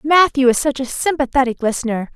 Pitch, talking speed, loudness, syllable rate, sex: 265 Hz, 165 wpm, -17 LUFS, 5.9 syllables/s, female